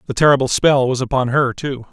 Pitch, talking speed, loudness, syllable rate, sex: 130 Hz, 220 wpm, -16 LUFS, 5.8 syllables/s, male